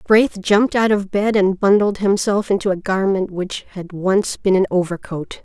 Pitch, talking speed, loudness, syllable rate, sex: 195 Hz, 190 wpm, -18 LUFS, 4.7 syllables/s, female